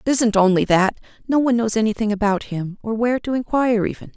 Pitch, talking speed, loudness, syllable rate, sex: 220 Hz, 215 wpm, -19 LUFS, 6.4 syllables/s, female